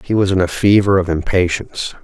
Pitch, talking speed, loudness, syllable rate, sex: 90 Hz, 205 wpm, -15 LUFS, 5.9 syllables/s, male